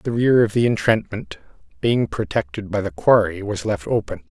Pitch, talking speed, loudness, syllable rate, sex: 110 Hz, 180 wpm, -20 LUFS, 5.0 syllables/s, male